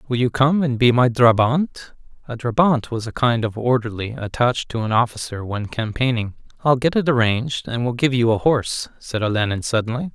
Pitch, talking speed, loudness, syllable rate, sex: 120 Hz, 195 wpm, -20 LUFS, 3.4 syllables/s, male